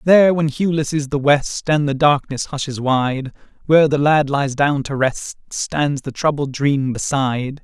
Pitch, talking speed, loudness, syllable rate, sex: 140 Hz, 180 wpm, -18 LUFS, 4.4 syllables/s, male